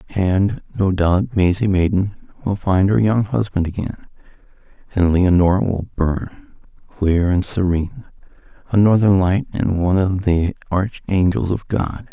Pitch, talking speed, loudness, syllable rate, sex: 95 Hz, 140 wpm, -18 LUFS, 4.3 syllables/s, male